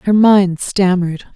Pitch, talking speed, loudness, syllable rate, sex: 190 Hz, 135 wpm, -14 LUFS, 4.0 syllables/s, female